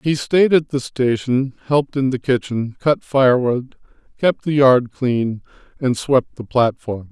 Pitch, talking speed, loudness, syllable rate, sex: 130 Hz, 160 wpm, -18 LUFS, 4.1 syllables/s, male